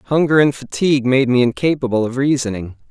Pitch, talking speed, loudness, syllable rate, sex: 130 Hz, 165 wpm, -16 LUFS, 5.8 syllables/s, male